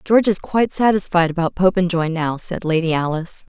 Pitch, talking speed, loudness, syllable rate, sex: 180 Hz, 170 wpm, -18 LUFS, 5.9 syllables/s, female